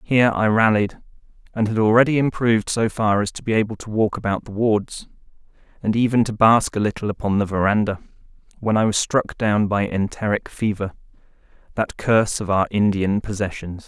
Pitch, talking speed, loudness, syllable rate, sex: 105 Hz, 175 wpm, -20 LUFS, 5.5 syllables/s, male